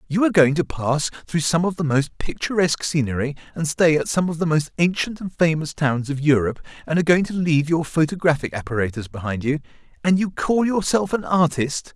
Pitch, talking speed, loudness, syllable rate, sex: 160 Hz, 205 wpm, -21 LUFS, 5.8 syllables/s, male